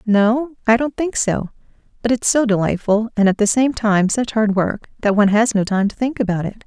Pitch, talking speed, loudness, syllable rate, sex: 220 Hz, 235 wpm, -17 LUFS, 5.2 syllables/s, female